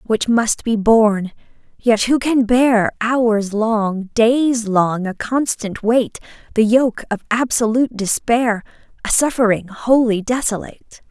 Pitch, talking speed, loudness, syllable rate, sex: 225 Hz, 130 wpm, -17 LUFS, 3.8 syllables/s, female